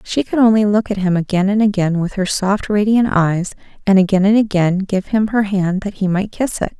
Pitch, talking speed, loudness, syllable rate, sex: 200 Hz, 240 wpm, -16 LUFS, 5.2 syllables/s, female